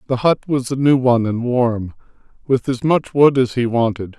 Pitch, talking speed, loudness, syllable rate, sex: 125 Hz, 215 wpm, -17 LUFS, 5.0 syllables/s, male